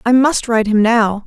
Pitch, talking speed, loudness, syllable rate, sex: 230 Hz, 235 wpm, -14 LUFS, 4.3 syllables/s, female